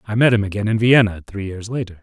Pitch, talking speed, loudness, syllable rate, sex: 105 Hz, 265 wpm, -18 LUFS, 6.6 syllables/s, male